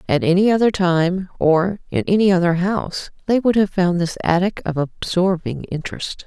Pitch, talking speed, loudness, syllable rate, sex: 180 Hz, 170 wpm, -19 LUFS, 5.0 syllables/s, female